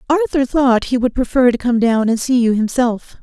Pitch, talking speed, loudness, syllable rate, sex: 245 Hz, 225 wpm, -15 LUFS, 5.0 syllables/s, female